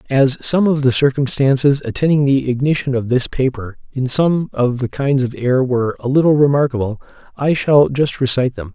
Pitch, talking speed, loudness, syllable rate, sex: 135 Hz, 185 wpm, -16 LUFS, 5.3 syllables/s, male